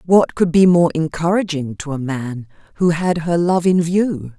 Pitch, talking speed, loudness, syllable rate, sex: 165 Hz, 190 wpm, -17 LUFS, 4.4 syllables/s, female